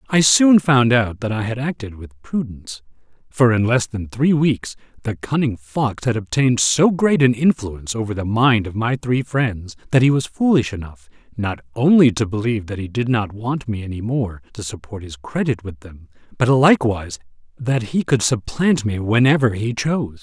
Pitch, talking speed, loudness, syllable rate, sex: 115 Hz, 195 wpm, -18 LUFS, 5.0 syllables/s, male